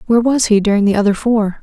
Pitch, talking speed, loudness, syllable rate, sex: 215 Hz, 260 wpm, -14 LUFS, 6.8 syllables/s, female